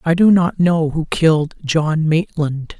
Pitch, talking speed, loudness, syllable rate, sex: 160 Hz, 170 wpm, -16 LUFS, 3.9 syllables/s, male